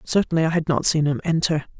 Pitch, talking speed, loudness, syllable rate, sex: 160 Hz, 235 wpm, -21 LUFS, 6.3 syllables/s, female